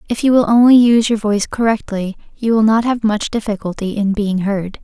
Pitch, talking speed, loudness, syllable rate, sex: 215 Hz, 210 wpm, -15 LUFS, 5.6 syllables/s, female